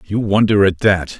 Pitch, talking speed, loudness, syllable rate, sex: 100 Hz, 200 wpm, -15 LUFS, 4.6 syllables/s, male